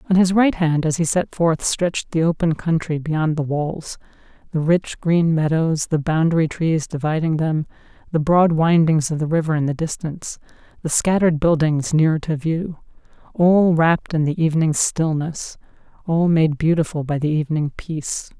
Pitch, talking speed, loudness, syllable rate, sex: 160 Hz, 165 wpm, -19 LUFS, 4.9 syllables/s, female